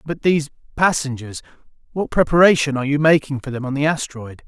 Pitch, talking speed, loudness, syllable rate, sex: 145 Hz, 160 wpm, -18 LUFS, 6.5 syllables/s, male